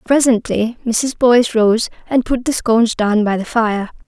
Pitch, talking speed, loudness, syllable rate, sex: 235 Hz, 175 wpm, -15 LUFS, 4.6 syllables/s, female